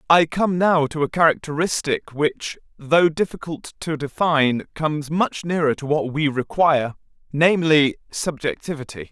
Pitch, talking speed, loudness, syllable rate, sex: 155 Hz, 130 wpm, -20 LUFS, 4.7 syllables/s, male